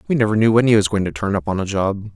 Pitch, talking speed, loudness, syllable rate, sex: 105 Hz, 360 wpm, -18 LUFS, 7.1 syllables/s, male